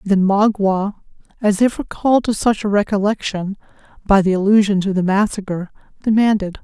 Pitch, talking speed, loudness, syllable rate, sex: 200 Hz, 145 wpm, -17 LUFS, 5.3 syllables/s, female